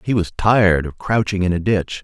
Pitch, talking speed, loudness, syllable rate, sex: 95 Hz, 235 wpm, -18 LUFS, 5.4 syllables/s, male